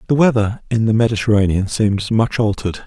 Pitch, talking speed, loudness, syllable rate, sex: 110 Hz, 170 wpm, -17 LUFS, 5.8 syllables/s, male